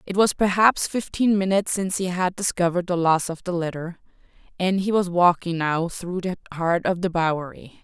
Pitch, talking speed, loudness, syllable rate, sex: 180 Hz, 190 wpm, -22 LUFS, 5.3 syllables/s, female